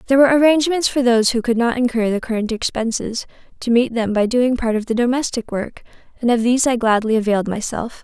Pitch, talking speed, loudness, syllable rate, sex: 235 Hz, 215 wpm, -18 LUFS, 6.5 syllables/s, female